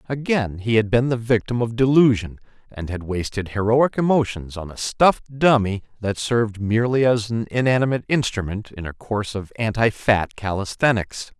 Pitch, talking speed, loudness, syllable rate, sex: 110 Hz, 165 wpm, -21 LUFS, 5.2 syllables/s, male